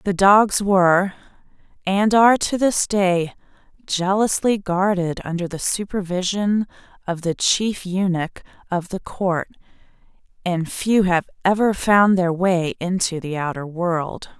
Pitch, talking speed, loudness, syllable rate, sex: 185 Hz, 130 wpm, -20 LUFS, 3.9 syllables/s, female